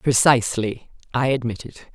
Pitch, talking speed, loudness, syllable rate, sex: 120 Hz, 95 wpm, -21 LUFS, 4.8 syllables/s, female